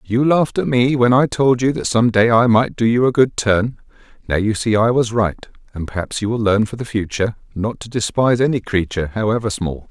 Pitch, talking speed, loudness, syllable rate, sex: 115 Hz, 235 wpm, -17 LUFS, 5.6 syllables/s, male